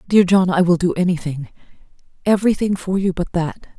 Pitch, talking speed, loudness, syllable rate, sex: 180 Hz, 160 wpm, -18 LUFS, 5.7 syllables/s, female